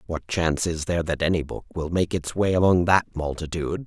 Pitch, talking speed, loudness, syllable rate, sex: 85 Hz, 215 wpm, -24 LUFS, 5.9 syllables/s, male